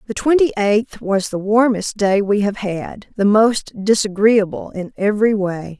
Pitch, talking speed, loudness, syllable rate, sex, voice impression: 205 Hz, 165 wpm, -17 LUFS, 4.3 syllables/s, female, feminine, slightly gender-neutral, slightly young, adult-like, slightly thick, tensed, slightly powerful, very bright, slightly hard, clear, fluent, slightly raspy, slightly cool, intellectual, slightly refreshing, sincere, calm, slightly friendly, slightly elegant, very lively, slightly strict, slightly sharp